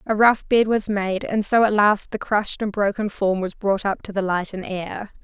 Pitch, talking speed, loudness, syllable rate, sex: 205 Hz, 250 wpm, -21 LUFS, 4.8 syllables/s, female